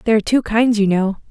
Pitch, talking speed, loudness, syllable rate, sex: 215 Hz, 275 wpm, -16 LUFS, 7.3 syllables/s, female